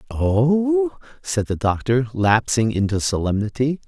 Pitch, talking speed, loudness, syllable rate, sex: 130 Hz, 110 wpm, -20 LUFS, 3.9 syllables/s, male